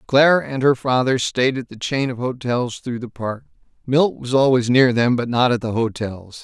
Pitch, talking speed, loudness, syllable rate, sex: 125 Hz, 215 wpm, -19 LUFS, 4.8 syllables/s, male